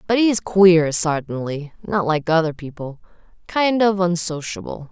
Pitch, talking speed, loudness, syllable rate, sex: 175 Hz, 110 wpm, -19 LUFS, 4.3 syllables/s, female